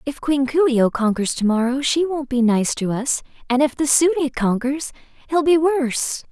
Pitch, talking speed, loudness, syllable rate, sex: 270 Hz, 220 wpm, -19 LUFS, 4.9 syllables/s, female